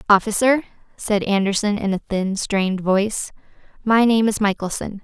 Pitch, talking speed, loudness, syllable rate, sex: 205 Hz, 145 wpm, -20 LUFS, 5.0 syllables/s, female